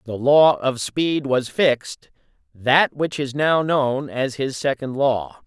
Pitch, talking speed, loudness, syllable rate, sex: 135 Hz, 165 wpm, -20 LUFS, 3.5 syllables/s, male